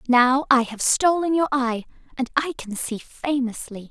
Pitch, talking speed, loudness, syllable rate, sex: 260 Hz, 170 wpm, -22 LUFS, 4.3 syllables/s, female